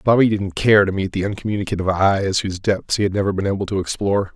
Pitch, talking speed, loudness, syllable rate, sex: 100 Hz, 235 wpm, -19 LUFS, 6.9 syllables/s, male